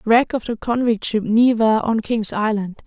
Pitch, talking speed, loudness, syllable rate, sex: 225 Hz, 190 wpm, -19 LUFS, 4.4 syllables/s, female